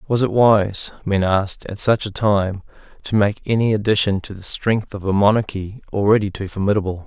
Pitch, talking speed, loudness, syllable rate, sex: 100 Hz, 185 wpm, -19 LUFS, 5.3 syllables/s, male